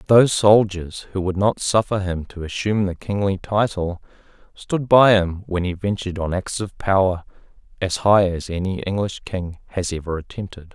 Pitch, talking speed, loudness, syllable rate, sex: 95 Hz, 175 wpm, -20 LUFS, 4.9 syllables/s, male